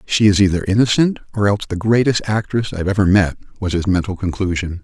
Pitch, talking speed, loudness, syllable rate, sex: 100 Hz, 200 wpm, -17 LUFS, 6.4 syllables/s, male